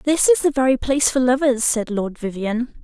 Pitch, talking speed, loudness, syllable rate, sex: 255 Hz, 210 wpm, -19 LUFS, 5.6 syllables/s, female